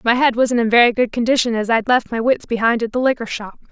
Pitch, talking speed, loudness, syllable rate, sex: 235 Hz, 275 wpm, -17 LUFS, 6.3 syllables/s, female